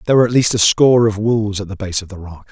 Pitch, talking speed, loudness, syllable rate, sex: 105 Hz, 335 wpm, -15 LUFS, 7.7 syllables/s, male